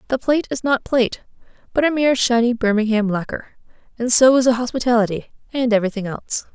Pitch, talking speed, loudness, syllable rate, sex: 240 Hz, 175 wpm, -18 LUFS, 6.6 syllables/s, female